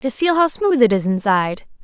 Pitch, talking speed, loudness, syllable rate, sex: 245 Hz, 230 wpm, -17 LUFS, 5.4 syllables/s, female